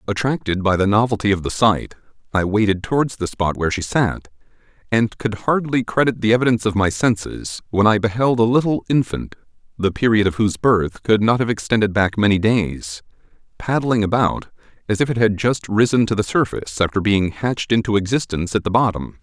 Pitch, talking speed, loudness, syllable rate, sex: 105 Hz, 190 wpm, -19 LUFS, 5.7 syllables/s, male